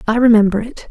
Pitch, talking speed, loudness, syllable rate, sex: 225 Hz, 200 wpm, -13 LUFS, 6.5 syllables/s, female